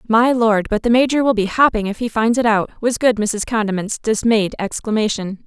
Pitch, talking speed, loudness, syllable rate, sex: 220 Hz, 210 wpm, -17 LUFS, 5.3 syllables/s, female